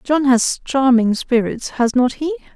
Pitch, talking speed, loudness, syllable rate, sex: 255 Hz, 165 wpm, -17 LUFS, 4.1 syllables/s, female